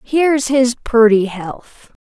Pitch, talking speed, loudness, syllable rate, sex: 240 Hz, 120 wpm, -14 LUFS, 3.4 syllables/s, female